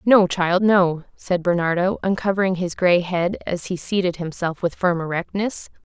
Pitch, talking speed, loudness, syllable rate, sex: 180 Hz, 165 wpm, -21 LUFS, 4.7 syllables/s, female